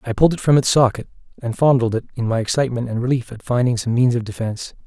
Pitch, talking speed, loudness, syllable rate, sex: 120 Hz, 245 wpm, -19 LUFS, 7.1 syllables/s, male